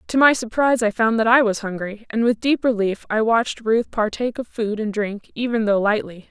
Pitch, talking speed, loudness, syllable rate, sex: 225 Hz, 230 wpm, -20 LUFS, 5.5 syllables/s, female